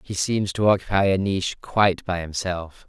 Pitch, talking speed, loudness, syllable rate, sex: 95 Hz, 190 wpm, -22 LUFS, 5.2 syllables/s, male